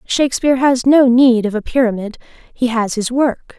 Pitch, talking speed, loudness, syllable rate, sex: 245 Hz, 185 wpm, -14 LUFS, 5.0 syllables/s, female